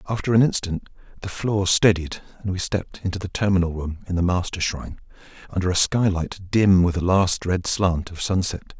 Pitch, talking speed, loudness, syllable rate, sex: 90 Hz, 185 wpm, -22 LUFS, 5.5 syllables/s, male